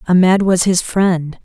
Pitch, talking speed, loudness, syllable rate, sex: 180 Hz, 165 wpm, -14 LUFS, 4.0 syllables/s, female